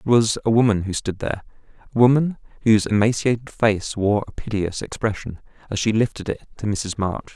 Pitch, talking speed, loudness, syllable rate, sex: 110 Hz, 190 wpm, -21 LUFS, 5.7 syllables/s, male